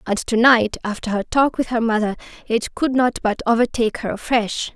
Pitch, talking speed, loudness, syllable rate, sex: 230 Hz, 200 wpm, -19 LUFS, 5.3 syllables/s, female